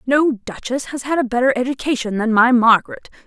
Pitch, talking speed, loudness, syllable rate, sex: 250 Hz, 185 wpm, -17 LUFS, 5.7 syllables/s, female